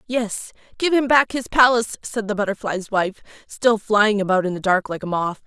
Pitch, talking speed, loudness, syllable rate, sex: 215 Hz, 210 wpm, -20 LUFS, 5.1 syllables/s, female